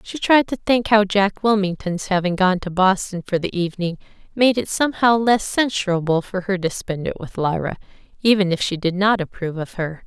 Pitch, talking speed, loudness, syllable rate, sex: 190 Hz, 205 wpm, -20 LUFS, 5.4 syllables/s, female